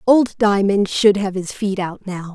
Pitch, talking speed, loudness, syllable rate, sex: 200 Hz, 205 wpm, -18 LUFS, 4.1 syllables/s, female